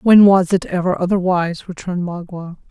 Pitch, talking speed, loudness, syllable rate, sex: 180 Hz, 155 wpm, -17 LUFS, 5.5 syllables/s, female